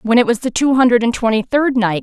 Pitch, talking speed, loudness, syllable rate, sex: 240 Hz, 295 wpm, -15 LUFS, 6.0 syllables/s, female